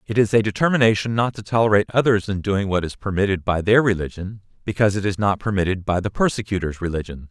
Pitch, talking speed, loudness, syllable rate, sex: 100 Hz, 205 wpm, -20 LUFS, 6.6 syllables/s, male